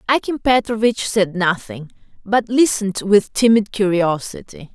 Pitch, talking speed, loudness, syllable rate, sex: 205 Hz, 115 wpm, -17 LUFS, 4.6 syllables/s, female